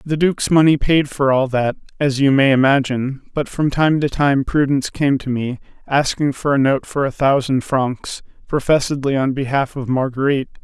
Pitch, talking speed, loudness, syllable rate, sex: 135 Hz, 185 wpm, -17 LUFS, 5.1 syllables/s, male